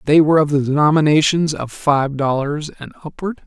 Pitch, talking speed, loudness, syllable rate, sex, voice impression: 150 Hz, 175 wpm, -16 LUFS, 5.5 syllables/s, male, very masculine, very adult-like, slightly old, thick, slightly relaxed, slightly weak, slightly dark, slightly hard, muffled, slightly halting, raspy, slightly cool, intellectual, sincere, calm, very mature, slightly friendly, slightly reassuring, very unique, slightly elegant, wild, slightly lively, slightly kind, slightly modest